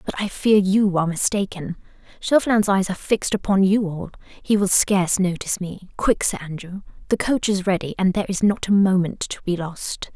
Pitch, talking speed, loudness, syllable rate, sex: 190 Hz, 195 wpm, -21 LUFS, 5.5 syllables/s, female